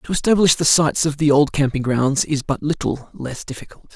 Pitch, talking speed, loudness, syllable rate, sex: 145 Hz, 210 wpm, -18 LUFS, 5.5 syllables/s, male